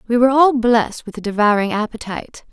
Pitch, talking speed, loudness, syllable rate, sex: 230 Hz, 190 wpm, -17 LUFS, 6.4 syllables/s, female